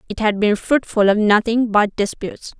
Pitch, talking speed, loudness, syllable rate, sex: 215 Hz, 185 wpm, -17 LUFS, 5.1 syllables/s, female